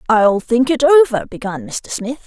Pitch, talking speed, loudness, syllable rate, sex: 240 Hz, 185 wpm, -15 LUFS, 5.1 syllables/s, female